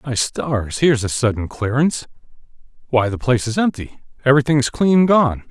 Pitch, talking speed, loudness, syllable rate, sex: 125 Hz, 130 wpm, -18 LUFS, 5.5 syllables/s, male